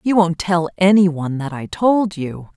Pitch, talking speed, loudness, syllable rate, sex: 175 Hz, 210 wpm, -17 LUFS, 4.6 syllables/s, female